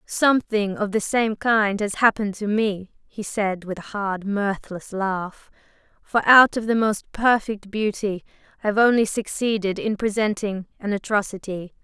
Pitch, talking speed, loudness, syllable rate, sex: 210 Hz, 155 wpm, -22 LUFS, 4.5 syllables/s, female